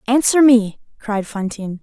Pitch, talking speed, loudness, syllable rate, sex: 225 Hz, 130 wpm, -16 LUFS, 4.7 syllables/s, female